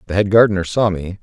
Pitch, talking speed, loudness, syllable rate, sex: 95 Hz, 245 wpm, -15 LUFS, 6.7 syllables/s, male